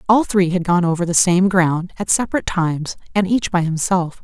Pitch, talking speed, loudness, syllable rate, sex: 180 Hz, 215 wpm, -17 LUFS, 5.5 syllables/s, female